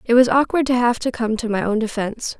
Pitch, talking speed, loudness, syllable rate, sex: 235 Hz, 275 wpm, -19 LUFS, 6.1 syllables/s, female